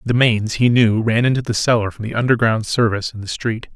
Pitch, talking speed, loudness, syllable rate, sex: 115 Hz, 240 wpm, -17 LUFS, 5.8 syllables/s, male